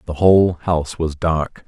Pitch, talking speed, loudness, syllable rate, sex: 85 Hz, 180 wpm, -18 LUFS, 4.9 syllables/s, male